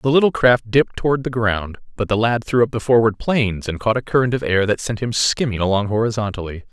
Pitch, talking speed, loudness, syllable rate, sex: 115 Hz, 240 wpm, -18 LUFS, 6.1 syllables/s, male